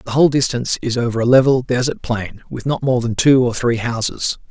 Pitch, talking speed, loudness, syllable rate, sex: 125 Hz, 225 wpm, -17 LUFS, 5.8 syllables/s, male